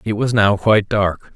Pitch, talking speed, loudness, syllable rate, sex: 105 Hz, 220 wpm, -16 LUFS, 4.8 syllables/s, male